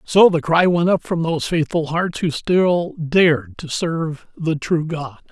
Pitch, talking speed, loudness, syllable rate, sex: 165 Hz, 190 wpm, -19 LUFS, 4.2 syllables/s, male